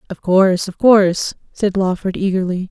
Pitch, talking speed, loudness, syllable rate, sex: 190 Hz, 155 wpm, -16 LUFS, 5.2 syllables/s, female